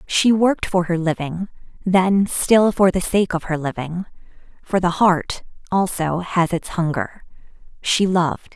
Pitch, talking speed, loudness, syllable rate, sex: 180 Hz, 140 wpm, -19 LUFS, 4.4 syllables/s, female